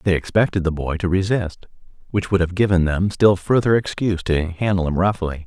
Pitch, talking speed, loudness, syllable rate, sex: 90 Hz, 200 wpm, -19 LUFS, 5.5 syllables/s, male